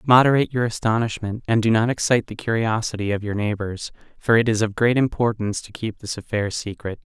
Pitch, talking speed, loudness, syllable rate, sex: 110 Hz, 195 wpm, -22 LUFS, 6.1 syllables/s, male